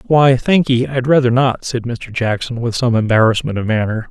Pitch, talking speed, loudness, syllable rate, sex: 120 Hz, 190 wpm, -15 LUFS, 5.1 syllables/s, male